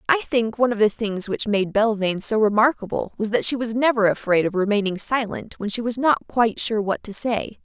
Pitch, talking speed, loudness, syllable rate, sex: 220 Hz, 230 wpm, -21 LUFS, 5.7 syllables/s, female